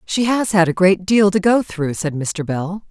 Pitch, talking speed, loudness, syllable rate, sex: 185 Hz, 250 wpm, -17 LUFS, 4.3 syllables/s, female